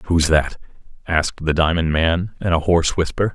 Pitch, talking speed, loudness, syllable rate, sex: 85 Hz, 180 wpm, -19 LUFS, 5.1 syllables/s, male